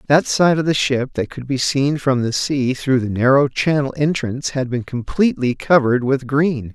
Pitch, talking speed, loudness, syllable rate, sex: 135 Hz, 205 wpm, -18 LUFS, 4.9 syllables/s, male